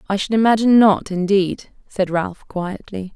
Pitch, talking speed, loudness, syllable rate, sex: 195 Hz, 150 wpm, -18 LUFS, 4.6 syllables/s, female